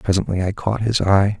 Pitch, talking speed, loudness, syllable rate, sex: 100 Hz, 215 wpm, -19 LUFS, 5.4 syllables/s, male